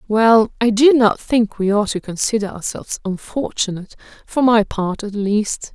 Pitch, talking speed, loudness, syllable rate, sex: 215 Hz, 165 wpm, -17 LUFS, 4.6 syllables/s, female